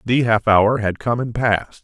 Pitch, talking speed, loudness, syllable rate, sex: 110 Hz, 230 wpm, -18 LUFS, 4.6 syllables/s, male